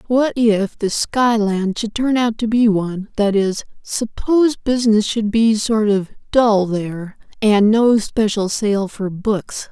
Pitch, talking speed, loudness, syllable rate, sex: 215 Hz, 155 wpm, -17 LUFS, 3.9 syllables/s, female